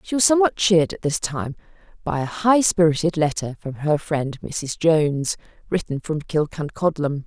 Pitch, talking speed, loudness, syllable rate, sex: 165 Hz, 155 wpm, -21 LUFS, 5.2 syllables/s, female